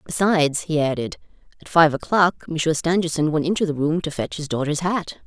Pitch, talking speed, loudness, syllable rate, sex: 160 Hz, 195 wpm, -21 LUFS, 5.7 syllables/s, female